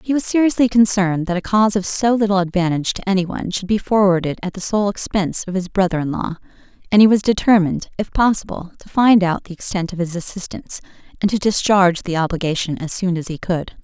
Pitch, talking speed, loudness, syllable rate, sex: 190 Hz, 215 wpm, -18 LUFS, 6.3 syllables/s, female